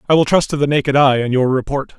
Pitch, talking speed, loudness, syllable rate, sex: 140 Hz, 300 wpm, -15 LUFS, 6.6 syllables/s, male